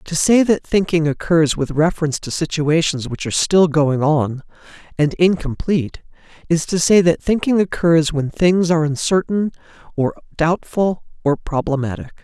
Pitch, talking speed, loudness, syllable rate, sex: 160 Hz, 145 wpm, -17 LUFS, 4.9 syllables/s, male